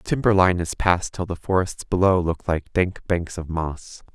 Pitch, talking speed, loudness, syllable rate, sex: 90 Hz, 205 wpm, -22 LUFS, 4.5 syllables/s, male